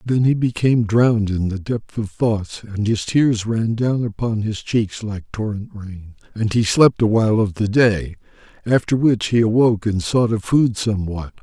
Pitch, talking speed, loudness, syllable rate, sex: 110 Hz, 195 wpm, -19 LUFS, 4.6 syllables/s, male